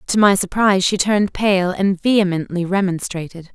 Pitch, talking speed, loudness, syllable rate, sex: 190 Hz, 150 wpm, -17 LUFS, 5.3 syllables/s, female